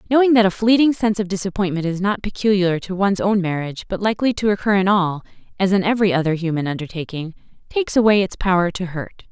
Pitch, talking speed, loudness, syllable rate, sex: 195 Hz, 205 wpm, -19 LUFS, 6.7 syllables/s, female